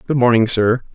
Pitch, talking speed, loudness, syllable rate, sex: 120 Hz, 190 wpm, -15 LUFS, 5.3 syllables/s, male